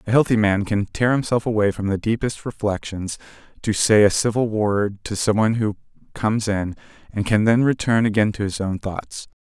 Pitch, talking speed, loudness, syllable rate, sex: 105 Hz, 190 wpm, -21 LUFS, 5.3 syllables/s, male